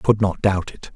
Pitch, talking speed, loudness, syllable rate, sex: 100 Hz, 315 wpm, -20 LUFS, 5.9 syllables/s, male